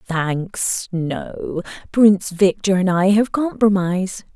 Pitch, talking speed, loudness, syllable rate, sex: 190 Hz, 110 wpm, -18 LUFS, 3.4 syllables/s, female